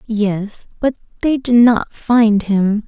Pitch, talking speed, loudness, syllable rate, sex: 220 Hz, 145 wpm, -15 LUFS, 3.0 syllables/s, female